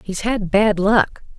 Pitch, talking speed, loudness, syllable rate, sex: 205 Hz, 175 wpm, -18 LUFS, 3.5 syllables/s, female